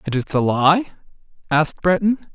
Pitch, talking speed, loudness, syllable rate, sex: 165 Hz, 130 wpm, -18 LUFS, 5.2 syllables/s, male